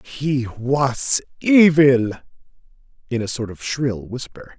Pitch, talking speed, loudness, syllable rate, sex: 130 Hz, 120 wpm, -19 LUFS, 3.3 syllables/s, male